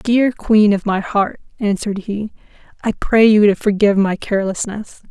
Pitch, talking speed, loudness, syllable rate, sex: 205 Hz, 165 wpm, -16 LUFS, 4.9 syllables/s, female